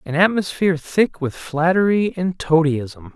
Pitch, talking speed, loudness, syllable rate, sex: 165 Hz, 135 wpm, -19 LUFS, 4.3 syllables/s, male